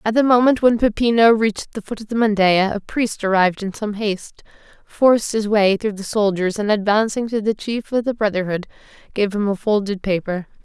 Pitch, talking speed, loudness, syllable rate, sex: 210 Hz, 205 wpm, -18 LUFS, 5.5 syllables/s, female